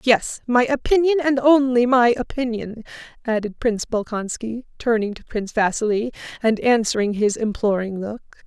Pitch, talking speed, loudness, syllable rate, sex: 235 Hz, 135 wpm, -20 LUFS, 5.1 syllables/s, female